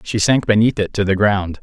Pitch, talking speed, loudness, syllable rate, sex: 105 Hz, 260 wpm, -16 LUFS, 5.2 syllables/s, male